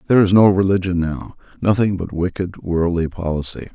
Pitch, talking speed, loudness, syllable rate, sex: 90 Hz, 160 wpm, -18 LUFS, 5.5 syllables/s, male